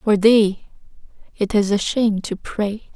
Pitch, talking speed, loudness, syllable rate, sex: 210 Hz, 160 wpm, -19 LUFS, 4.1 syllables/s, female